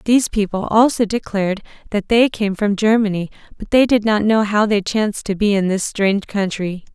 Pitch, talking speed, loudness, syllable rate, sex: 205 Hz, 200 wpm, -17 LUFS, 5.4 syllables/s, female